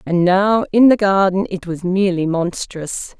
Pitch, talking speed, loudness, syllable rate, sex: 185 Hz, 170 wpm, -16 LUFS, 4.4 syllables/s, female